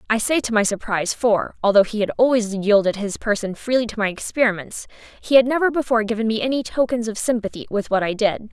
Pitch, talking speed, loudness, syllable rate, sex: 225 Hz, 220 wpm, -20 LUFS, 6.2 syllables/s, female